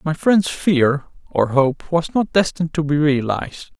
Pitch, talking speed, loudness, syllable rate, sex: 155 Hz, 175 wpm, -18 LUFS, 4.5 syllables/s, male